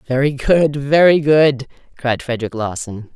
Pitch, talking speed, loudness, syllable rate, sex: 135 Hz, 115 wpm, -16 LUFS, 4.4 syllables/s, female